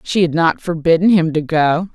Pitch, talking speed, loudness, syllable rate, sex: 165 Hz, 215 wpm, -15 LUFS, 4.9 syllables/s, female